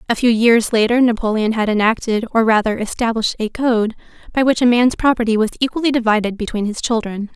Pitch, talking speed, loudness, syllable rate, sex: 225 Hz, 190 wpm, -16 LUFS, 6.1 syllables/s, female